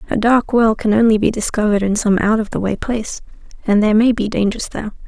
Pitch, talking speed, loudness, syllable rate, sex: 215 Hz, 235 wpm, -16 LUFS, 6.5 syllables/s, female